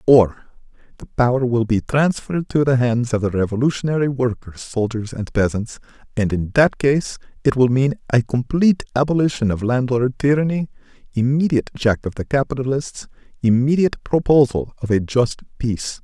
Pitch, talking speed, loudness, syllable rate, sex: 125 Hz, 145 wpm, -19 LUFS, 5.3 syllables/s, male